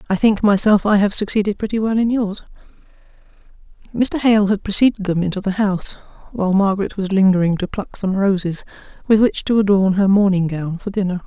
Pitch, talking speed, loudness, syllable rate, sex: 200 Hz, 185 wpm, -17 LUFS, 5.7 syllables/s, female